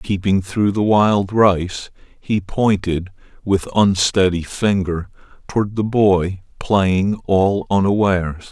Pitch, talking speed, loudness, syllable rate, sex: 95 Hz, 115 wpm, -17 LUFS, 3.5 syllables/s, male